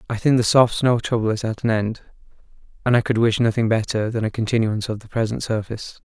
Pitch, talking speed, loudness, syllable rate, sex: 115 Hz, 225 wpm, -21 LUFS, 6.3 syllables/s, male